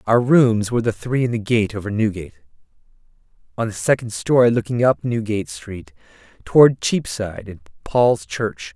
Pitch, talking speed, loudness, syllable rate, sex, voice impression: 110 Hz, 150 wpm, -19 LUFS, 5.2 syllables/s, male, very masculine, very adult-like, slightly old, very thick, tensed, powerful, slightly bright, slightly hard, clear, fluent, cool, very intellectual, sincere, very calm, very mature, friendly, reassuring, unique, elegant, slightly wild, sweet, lively, kind, slightly intense